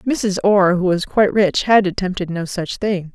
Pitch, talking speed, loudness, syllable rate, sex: 190 Hz, 210 wpm, -17 LUFS, 4.6 syllables/s, female